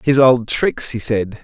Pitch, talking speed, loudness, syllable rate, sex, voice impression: 120 Hz, 210 wpm, -16 LUFS, 3.8 syllables/s, male, masculine, adult-like, slightly relaxed, fluent, slightly raspy, cool, sincere, slightly friendly, wild, slightly strict